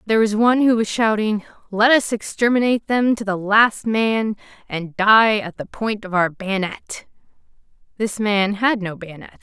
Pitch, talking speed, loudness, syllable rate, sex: 215 Hz, 170 wpm, -18 LUFS, 4.6 syllables/s, female